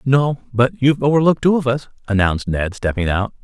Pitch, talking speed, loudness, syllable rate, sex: 125 Hz, 190 wpm, -18 LUFS, 6.2 syllables/s, male